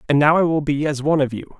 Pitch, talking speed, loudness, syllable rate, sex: 145 Hz, 340 wpm, -18 LUFS, 7.1 syllables/s, male